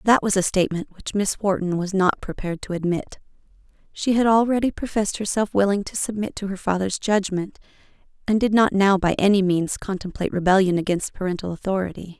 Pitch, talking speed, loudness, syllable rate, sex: 195 Hz, 175 wpm, -22 LUFS, 5.9 syllables/s, female